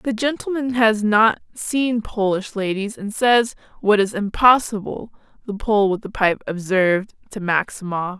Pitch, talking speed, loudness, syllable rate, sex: 210 Hz, 145 wpm, -19 LUFS, 4.3 syllables/s, female